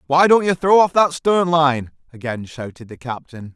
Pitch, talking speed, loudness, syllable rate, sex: 150 Hz, 205 wpm, -17 LUFS, 4.7 syllables/s, male